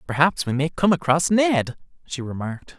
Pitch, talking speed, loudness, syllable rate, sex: 155 Hz, 170 wpm, -21 LUFS, 5.1 syllables/s, male